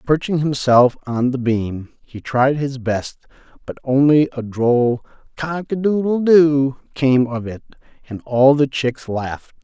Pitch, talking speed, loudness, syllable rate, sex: 135 Hz, 155 wpm, -18 LUFS, 3.9 syllables/s, male